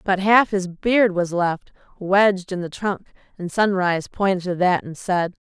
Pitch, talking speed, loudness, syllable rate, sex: 190 Hz, 185 wpm, -20 LUFS, 4.4 syllables/s, female